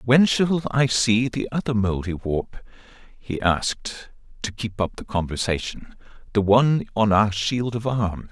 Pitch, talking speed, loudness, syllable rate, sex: 110 Hz, 145 wpm, -22 LUFS, 4.3 syllables/s, male